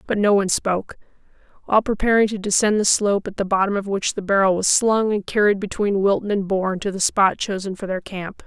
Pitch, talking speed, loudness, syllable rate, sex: 200 Hz, 225 wpm, -20 LUFS, 5.9 syllables/s, female